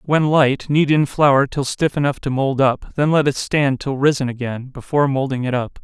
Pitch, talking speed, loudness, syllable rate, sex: 140 Hz, 225 wpm, -18 LUFS, 4.9 syllables/s, male